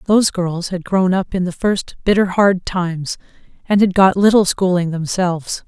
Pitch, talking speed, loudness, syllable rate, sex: 185 Hz, 180 wpm, -16 LUFS, 4.8 syllables/s, female